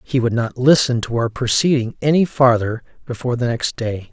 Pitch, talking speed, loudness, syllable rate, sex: 125 Hz, 190 wpm, -18 LUFS, 5.3 syllables/s, male